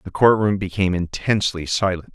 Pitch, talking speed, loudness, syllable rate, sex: 95 Hz, 140 wpm, -20 LUFS, 5.9 syllables/s, male